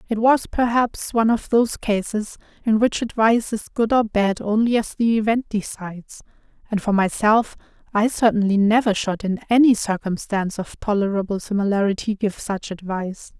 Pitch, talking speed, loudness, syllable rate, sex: 215 Hz, 155 wpm, -20 LUFS, 5.2 syllables/s, female